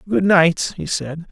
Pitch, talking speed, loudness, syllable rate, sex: 165 Hz, 185 wpm, -17 LUFS, 3.7 syllables/s, male